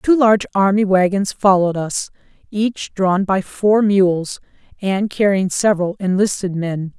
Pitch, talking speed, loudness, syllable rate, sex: 195 Hz, 135 wpm, -17 LUFS, 4.3 syllables/s, female